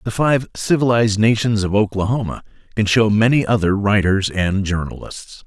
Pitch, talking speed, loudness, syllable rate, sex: 105 Hz, 145 wpm, -17 LUFS, 5.0 syllables/s, male